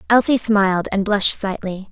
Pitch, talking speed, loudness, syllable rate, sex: 205 Hz, 155 wpm, -17 LUFS, 5.4 syllables/s, female